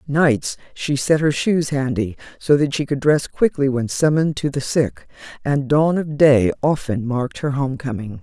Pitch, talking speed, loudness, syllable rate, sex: 140 Hz, 190 wpm, -19 LUFS, 4.6 syllables/s, female